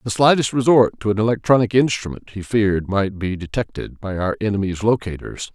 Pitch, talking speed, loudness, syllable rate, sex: 105 Hz, 175 wpm, -19 LUFS, 5.6 syllables/s, male